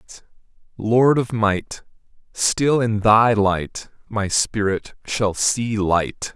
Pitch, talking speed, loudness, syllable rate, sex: 110 Hz, 125 wpm, -19 LUFS, 3.5 syllables/s, male